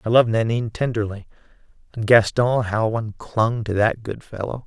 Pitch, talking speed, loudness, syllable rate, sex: 110 Hz, 165 wpm, -21 LUFS, 5.5 syllables/s, male